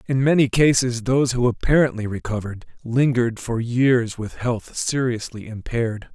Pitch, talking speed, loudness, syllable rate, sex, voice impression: 120 Hz, 135 wpm, -21 LUFS, 5.0 syllables/s, male, masculine, adult-like, clear, fluent, slightly raspy, cool, intellectual, calm, slightly friendly, reassuring, elegant, wild, slightly strict